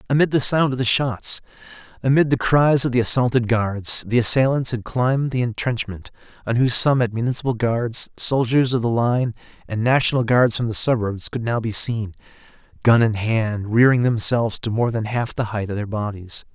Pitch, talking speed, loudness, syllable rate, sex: 120 Hz, 190 wpm, -19 LUFS, 5.2 syllables/s, male